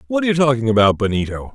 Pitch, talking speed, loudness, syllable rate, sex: 125 Hz, 235 wpm, -17 LUFS, 8.0 syllables/s, male